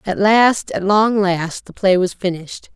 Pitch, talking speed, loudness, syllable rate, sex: 195 Hz, 195 wpm, -16 LUFS, 4.2 syllables/s, female